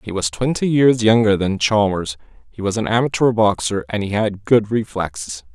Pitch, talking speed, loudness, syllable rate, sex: 110 Hz, 185 wpm, -18 LUFS, 5.0 syllables/s, male